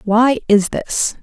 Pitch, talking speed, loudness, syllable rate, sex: 225 Hz, 145 wpm, -16 LUFS, 3.1 syllables/s, female